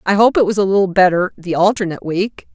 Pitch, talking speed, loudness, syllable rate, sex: 195 Hz, 235 wpm, -15 LUFS, 6.4 syllables/s, female